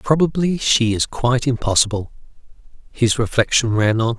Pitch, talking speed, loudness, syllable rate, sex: 120 Hz, 130 wpm, -18 LUFS, 5.1 syllables/s, male